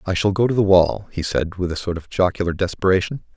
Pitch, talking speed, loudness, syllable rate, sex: 95 Hz, 250 wpm, -20 LUFS, 6.1 syllables/s, male